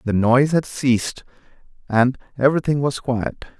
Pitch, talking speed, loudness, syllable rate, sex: 130 Hz, 135 wpm, -20 LUFS, 5.2 syllables/s, male